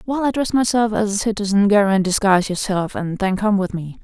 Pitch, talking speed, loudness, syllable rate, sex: 205 Hz, 240 wpm, -18 LUFS, 5.9 syllables/s, female